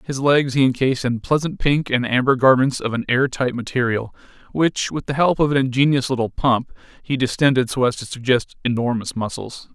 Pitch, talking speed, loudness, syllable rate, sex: 130 Hz, 195 wpm, -19 LUFS, 5.4 syllables/s, male